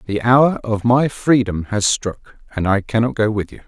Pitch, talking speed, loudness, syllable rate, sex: 110 Hz, 210 wpm, -17 LUFS, 4.6 syllables/s, male